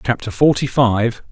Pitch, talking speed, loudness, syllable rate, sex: 120 Hz, 135 wpm, -16 LUFS, 4.4 syllables/s, male